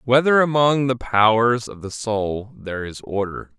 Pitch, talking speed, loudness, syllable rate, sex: 115 Hz, 165 wpm, -20 LUFS, 4.3 syllables/s, male